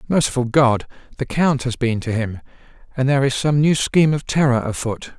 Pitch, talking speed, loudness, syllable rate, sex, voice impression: 130 Hz, 195 wpm, -19 LUFS, 5.5 syllables/s, male, masculine, adult-like, relaxed, slightly powerful, slightly bright, raspy, cool, friendly, wild, kind, slightly modest